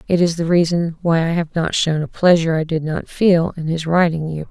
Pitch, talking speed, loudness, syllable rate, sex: 165 Hz, 255 wpm, -18 LUFS, 5.4 syllables/s, female